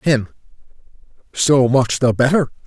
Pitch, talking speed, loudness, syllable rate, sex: 130 Hz, 115 wpm, -16 LUFS, 4.2 syllables/s, male